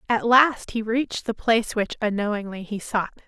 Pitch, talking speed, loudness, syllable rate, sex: 220 Hz, 185 wpm, -23 LUFS, 5.2 syllables/s, female